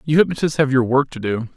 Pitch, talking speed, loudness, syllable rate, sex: 135 Hz, 270 wpm, -18 LUFS, 6.4 syllables/s, male